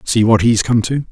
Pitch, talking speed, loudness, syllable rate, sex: 115 Hz, 270 wpm, -14 LUFS, 5.1 syllables/s, male